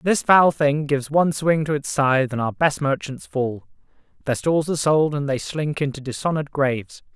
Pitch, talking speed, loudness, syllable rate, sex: 145 Hz, 200 wpm, -21 LUFS, 5.5 syllables/s, male